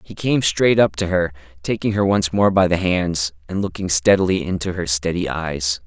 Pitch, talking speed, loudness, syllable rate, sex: 90 Hz, 205 wpm, -19 LUFS, 4.9 syllables/s, male